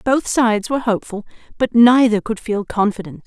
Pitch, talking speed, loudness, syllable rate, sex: 225 Hz, 165 wpm, -17 LUFS, 5.7 syllables/s, female